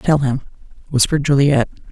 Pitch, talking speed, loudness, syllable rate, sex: 140 Hz, 125 wpm, -17 LUFS, 6.7 syllables/s, female